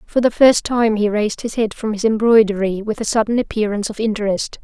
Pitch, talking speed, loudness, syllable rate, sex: 215 Hz, 205 wpm, -17 LUFS, 6.0 syllables/s, female